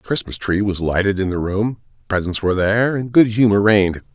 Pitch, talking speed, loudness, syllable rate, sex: 100 Hz, 215 wpm, -18 LUFS, 5.9 syllables/s, male